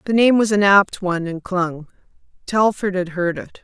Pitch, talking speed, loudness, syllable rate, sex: 190 Hz, 200 wpm, -18 LUFS, 4.8 syllables/s, female